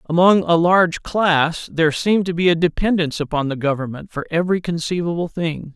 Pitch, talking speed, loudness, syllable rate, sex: 170 Hz, 175 wpm, -18 LUFS, 5.7 syllables/s, male